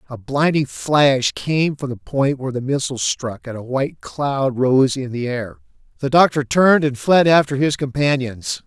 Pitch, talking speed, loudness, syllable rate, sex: 135 Hz, 185 wpm, -18 LUFS, 4.6 syllables/s, male